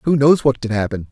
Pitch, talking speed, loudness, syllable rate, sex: 125 Hz, 270 wpm, -16 LUFS, 6.1 syllables/s, male